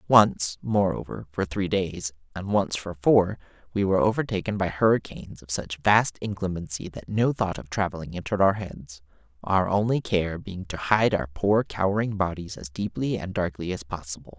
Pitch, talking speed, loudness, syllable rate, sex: 95 Hz, 175 wpm, -25 LUFS, 5.0 syllables/s, male